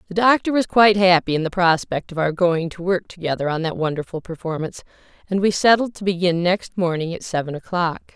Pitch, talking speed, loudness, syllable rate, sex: 180 Hz, 205 wpm, -20 LUFS, 6.0 syllables/s, female